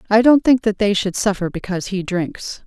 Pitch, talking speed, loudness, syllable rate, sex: 205 Hz, 200 wpm, -18 LUFS, 4.9 syllables/s, female